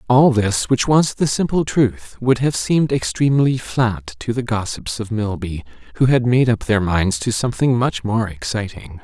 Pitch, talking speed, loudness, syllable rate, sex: 115 Hz, 185 wpm, -18 LUFS, 4.6 syllables/s, male